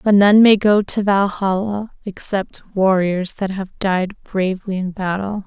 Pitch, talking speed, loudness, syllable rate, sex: 195 Hz, 155 wpm, -18 LUFS, 4.0 syllables/s, female